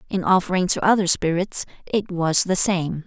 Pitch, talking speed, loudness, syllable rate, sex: 180 Hz, 175 wpm, -20 LUFS, 4.9 syllables/s, female